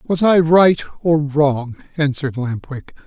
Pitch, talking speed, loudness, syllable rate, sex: 150 Hz, 155 wpm, -16 LUFS, 3.8 syllables/s, male